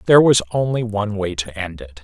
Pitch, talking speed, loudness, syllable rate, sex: 105 Hz, 235 wpm, -19 LUFS, 6.3 syllables/s, male